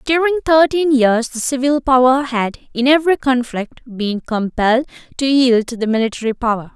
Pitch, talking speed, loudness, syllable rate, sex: 255 Hz, 160 wpm, -16 LUFS, 5.2 syllables/s, female